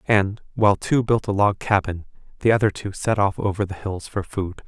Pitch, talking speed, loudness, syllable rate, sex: 100 Hz, 220 wpm, -22 LUFS, 5.2 syllables/s, male